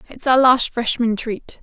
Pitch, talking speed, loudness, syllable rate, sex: 240 Hz, 185 wpm, -18 LUFS, 4.2 syllables/s, female